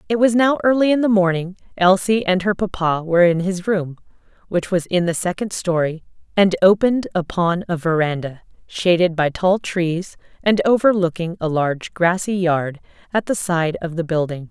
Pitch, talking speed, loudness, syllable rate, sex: 180 Hz, 175 wpm, -19 LUFS, 5.0 syllables/s, female